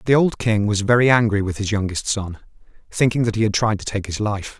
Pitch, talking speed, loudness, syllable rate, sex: 105 Hz, 250 wpm, -19 LUFS, 5.8 syllables/s, male